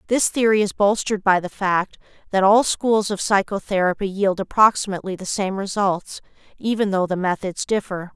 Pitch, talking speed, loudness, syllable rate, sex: 195 Hz, 160 wpm, -20 LUFS, 5.2 syllables/s, female